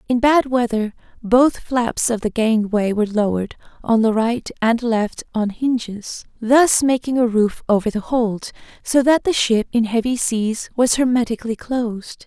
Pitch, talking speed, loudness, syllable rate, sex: 230 Hz, 165 wpm, -18 LUFS, 4.5 syllables/s, female